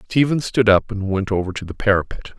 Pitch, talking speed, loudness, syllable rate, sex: 105 Hz, 225 wpm, -19 LUFS, 5.8 syllables/s, male